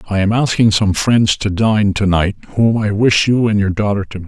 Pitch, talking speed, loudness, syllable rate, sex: 105 Hz, 255 wpm, -14 LUFS, 5.1 syllables/s, male